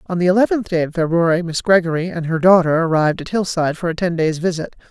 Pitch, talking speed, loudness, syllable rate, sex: 170 Hz, 230 wpm, -17 LUFS, 6.7 syllables/s, female